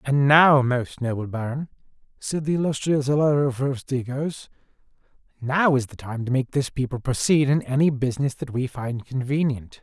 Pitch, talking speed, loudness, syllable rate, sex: 135 Hz, 160 wpm, -23 LUFS, 5.0 syllables/s, male